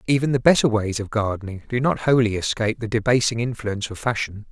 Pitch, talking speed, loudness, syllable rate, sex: 115 Hz, 200 wpm, -21 LUFS, 6.3 syllables/s, male